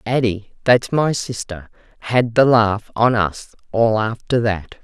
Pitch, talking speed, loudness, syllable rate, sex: 110 Hz, 125 wpm, -18 LUFS, 3.8 syllables/s, female